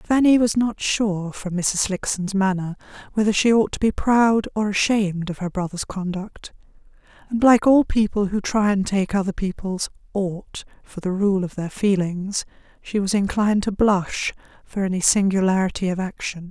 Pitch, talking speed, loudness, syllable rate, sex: 200 Hz, 170 wpm, -21 LUFS, 4.7 syllables/s, female